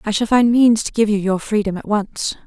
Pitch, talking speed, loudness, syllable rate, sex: 215 Hz, 270 wpm, -17 LUFS, 5.3 syllables/s, female